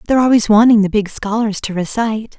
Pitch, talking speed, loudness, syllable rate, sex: 215 Hz, 200 wpm, -14 LUFS, 6.3 syllables/s, female